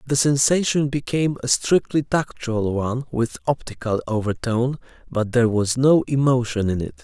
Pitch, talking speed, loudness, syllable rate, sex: 125 Hz, 145 wpm, -21 LUFS, 5.3 syllables/s, male